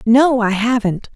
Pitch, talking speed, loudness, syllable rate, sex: 235 Hz, 155 wpm, -15 LUFS, 4.0 syllables/s, female